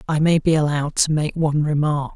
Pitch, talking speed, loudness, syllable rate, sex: 150 Hz, 225 wpm, -19 LUFS, 6.0 syllables/s, male